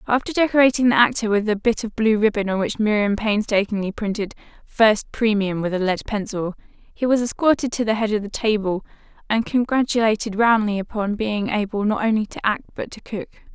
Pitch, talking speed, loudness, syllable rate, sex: 215 Hz, 190 wpm, -20 LUFS, 5.6 syllables/s, female